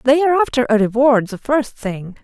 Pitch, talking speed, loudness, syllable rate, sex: 250 Hz, 215 wpm, -16 LUFS, 5.4 syllables/s, female